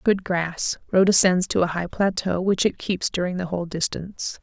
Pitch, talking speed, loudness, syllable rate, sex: 180 Hz, 205 wpm, -22 LUFS, 5.0 syllables/s, female